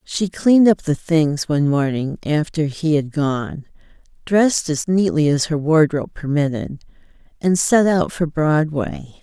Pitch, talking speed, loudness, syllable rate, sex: 155 Hz, 150 wpm, -18 LUFS, 4.4 syllables/s, female